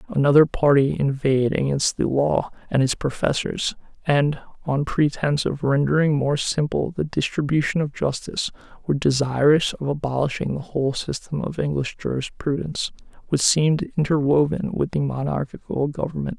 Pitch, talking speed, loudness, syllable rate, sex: 145 Hz, 130 wpm, -22 LUFS, 5.2 syllables/s, male